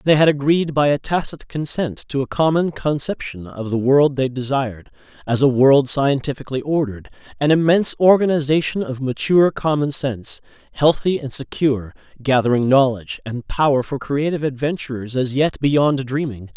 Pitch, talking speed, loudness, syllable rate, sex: 140 Hz, 150 wpm, -19 LUFS, 5.3 syllables/s, male